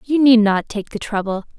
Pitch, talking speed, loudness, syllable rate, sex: 220 Hz, 225 wpm, -17 LUFS, 5.2 syllables/s, female